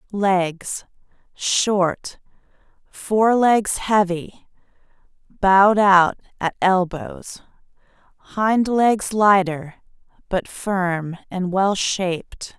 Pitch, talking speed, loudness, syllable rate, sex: 195 Hz, 75 wpm, -19 LUFS, 2.6 syllables/s, female